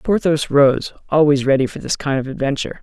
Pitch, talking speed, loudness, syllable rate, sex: 140 Hz, 190 wpm, -17 LUFS, 5.8 syllables/s, male